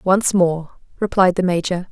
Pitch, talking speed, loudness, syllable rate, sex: 180 Hz, 155 wpm, -18 LUFS, 4.6 syllables/s, female